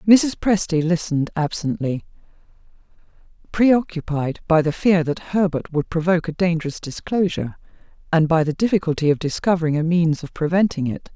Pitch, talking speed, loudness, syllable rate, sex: 165 Hz, 140 wpm, -20 LUFS, 5.5 syllables/s, female